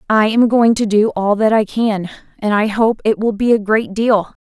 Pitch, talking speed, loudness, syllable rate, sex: 215 Hz, 245 wpm, -15 LUFS, 4.7 syllables/s, female